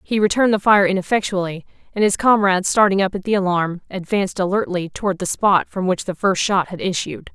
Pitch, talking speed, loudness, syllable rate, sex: 190 Hz, 205 wpm, -18 LUFS, 6.0 syllables/s, female